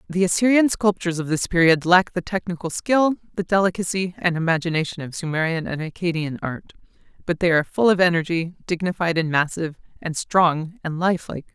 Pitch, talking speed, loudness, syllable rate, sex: 175 Hz, 165 wpm, -21 LUFS, 5.9 syllables/s, female